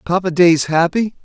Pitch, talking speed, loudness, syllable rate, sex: 175 Hz, 145 wpm, -14 LUFS, 4.7 syllables/s, male